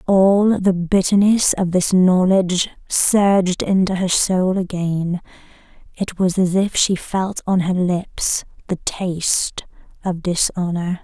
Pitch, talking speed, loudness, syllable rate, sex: 185 Hz, 130 wpm, -18 LUFS, 3.7 syllables/s, female